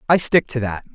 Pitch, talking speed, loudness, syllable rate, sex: 130 Hz, 255 wpm, -19 LUFS, 5.8 syllables/s, male